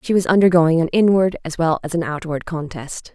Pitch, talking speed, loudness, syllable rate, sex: 165 Hz, 210 wpm, -18 LUFS, 5.4 syllables/s, female